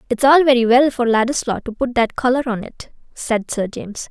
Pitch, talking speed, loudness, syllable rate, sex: 245 Hz, 220 wpm, -17 LUFS, 5.5 syllables/s, female